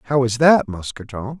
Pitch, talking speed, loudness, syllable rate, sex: 125 Hz, 170 wpm, -16 LUFS, 5.0 syllables/s, male